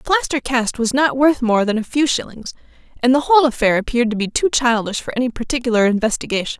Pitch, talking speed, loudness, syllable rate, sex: 250 Hz, 220 wpm, -17 LUFS, 6.5 syllables/s, female